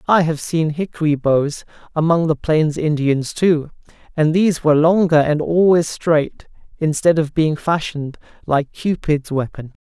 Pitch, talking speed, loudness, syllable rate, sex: 155 Hz, 145 wpm, -17 LUFS, 4.5 syllables/s, male